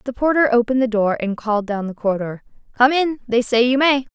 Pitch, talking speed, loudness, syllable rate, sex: 240 Hz, 230 wpm, -18 LUFS, 6.2 syllables/s, female